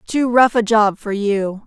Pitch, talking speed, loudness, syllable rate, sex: 220 Hz, 215 wpm, -16 LUFS, 4.0 syllables/s, female